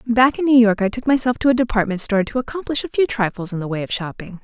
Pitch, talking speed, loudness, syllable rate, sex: 230 Hz, 285 wpm, -19 LUFS, 6.8 syllables/s, female